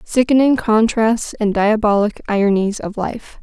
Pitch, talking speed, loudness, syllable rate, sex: 215 Hz, 125 wpm, -16 LUFS, 4.4 syllables/s, female